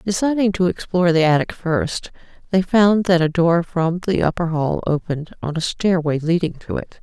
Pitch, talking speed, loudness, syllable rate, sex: 170 Hz, 190 wpm, -19 LUFS, 5.1 syllables/s, female